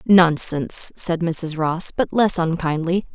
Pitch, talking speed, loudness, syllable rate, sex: 170 Hz, 135 wpm, -19 LUFS, 3.8 syllables/s, female